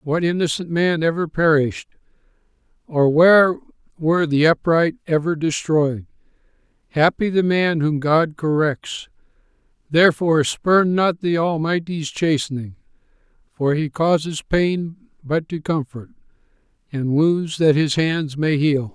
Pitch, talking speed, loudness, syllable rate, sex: 160 Hz, 120 wpm, -19 LUFS, 4.3 syllables/s, male